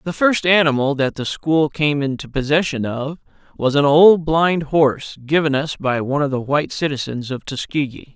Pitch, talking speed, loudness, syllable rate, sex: 145 Hz, 185 wpm, -18 LUFS, 5.0 syllables/s, male